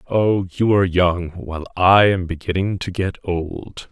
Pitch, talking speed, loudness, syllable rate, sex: 90 Hz, 170 wpm, -19 LUFS, 4.2 syllables/s, male